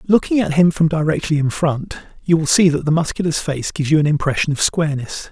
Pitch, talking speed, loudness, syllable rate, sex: 155 Hz, 225 wpm, -17 LUFS, 6.1 syllables/s, male